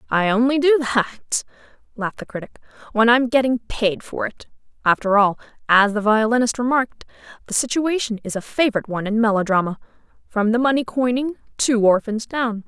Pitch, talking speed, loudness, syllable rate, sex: 230 Hz, 160 wpm, -20 LUFS, 5.7 syllables/s, female